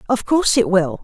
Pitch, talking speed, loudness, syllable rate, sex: 230 Hz, 230 wpm, -16 LUFS, 6.0 syllables/s, female